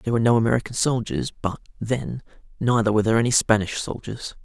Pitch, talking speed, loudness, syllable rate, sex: 115 Hz, 175 wpm, -22 LUFS, 6.7 syllables/s, male